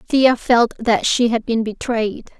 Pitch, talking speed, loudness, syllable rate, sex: 230 Hz, 175 wpm, -17 LUFS, 3.8 syllables/s, female